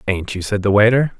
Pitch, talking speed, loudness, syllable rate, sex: 105 Hz, 250 wpm, -16 LUFS, 5.9 syllables/s, male